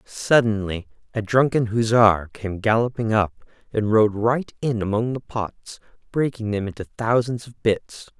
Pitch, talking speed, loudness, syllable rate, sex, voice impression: 110 Hz, 145 wpm, -22 LUFS, 4.3 syllables/s, male, masculine, adult-like, tensed, slightly bright, hard, fluent, cool, intellectual, sincere, calm, reassuring, wild, lively, kind, slightly modest